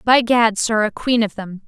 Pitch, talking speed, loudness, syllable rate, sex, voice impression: 220 Hz, 250 wpm, -17 LUFS, 4.5 syllables/s, female, feminine, slightly adult-like, slightly clear, slightly refreshing, friendly